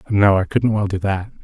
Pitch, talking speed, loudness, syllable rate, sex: 100 Hz, 250 wpm, -18 LUFS, 5.4 syllables/s, male